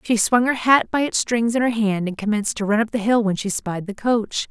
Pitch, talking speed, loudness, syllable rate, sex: 220 Hz, 295 wpm, -20 LUFS, 5.4 syllables/s, female